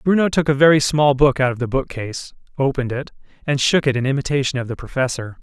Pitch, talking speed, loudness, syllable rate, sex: 135 Hz, 220 wpm, -18 LUFS, 6.5 syllables/s, male